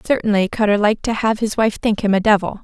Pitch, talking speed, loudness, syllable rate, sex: 210 Hz, 250 wpm, -17 LUFS, 6.3 syllables/s, female